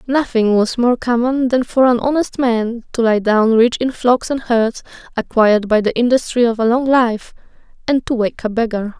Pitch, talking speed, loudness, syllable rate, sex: 235 Hz, 200 wpm, -16 LUFS, 4.9 syllables/s, female